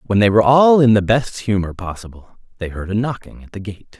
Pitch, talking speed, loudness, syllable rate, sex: 105 Hz, 240 wpm, -15 LUFS, 6.0 syllables/s, male